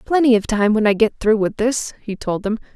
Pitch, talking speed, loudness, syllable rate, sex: 220 Hz, 260 wpm, -18 LUFS, 5.4 syllables/s, female